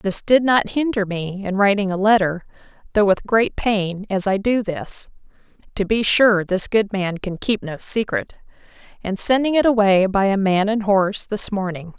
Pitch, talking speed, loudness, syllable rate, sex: 205 Hz, 190 wpm, -19 LUFS, 4.5 syllables/s, female